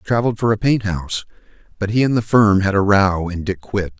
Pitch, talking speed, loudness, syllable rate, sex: 100 Hz, 240 wpm, -18 LUFS, 5.6 syllables/s, male